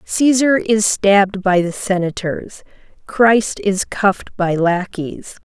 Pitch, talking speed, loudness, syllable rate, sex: 200 Hz, 120 wpm, -16 LUFS, 3.5 syllables/s, female